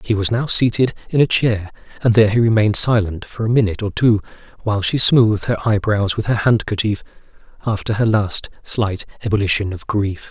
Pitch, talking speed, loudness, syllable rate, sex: 105 Hz, 185 wpm, -17 LUFS, 5.8 syllables/s, male